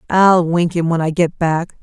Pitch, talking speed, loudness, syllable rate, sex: 170 Hz, 230 wpm, -15 LUFS, 4.4 syllables/s, female